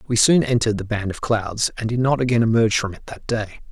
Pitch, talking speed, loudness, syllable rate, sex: 115 Hz, 260 wpm, -20 LUFS, 6.4 syllables/s, male